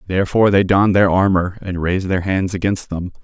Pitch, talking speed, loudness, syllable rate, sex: 95 Hz, 205 wpm, -17 LUFS, 6.2 syllables/s, male